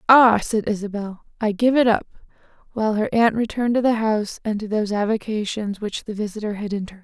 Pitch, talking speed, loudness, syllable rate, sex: 215 Hz, 190 wpm, -21 LUFS, 6.4 syllables/s, female